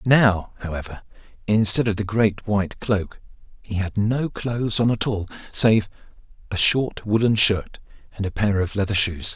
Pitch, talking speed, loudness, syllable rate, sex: 105 Hz, 165 wpm, -22 LUFS, 4.7 syllables/s, male